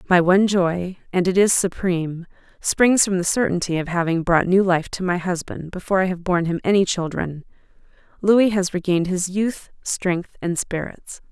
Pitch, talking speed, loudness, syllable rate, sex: 180 Hz, 180 wpm, -20 LUFS, 5.1 syllables/s, female